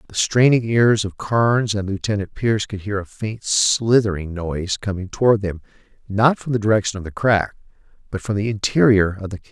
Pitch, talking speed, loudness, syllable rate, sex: 105 Hz, 195 wpm, -19 LUFS, 5.5 syllables/s, male